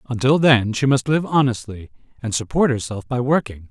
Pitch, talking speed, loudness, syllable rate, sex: 125 Hz, 180 wpm, -19 LUFS, 5.2 syllables/s, male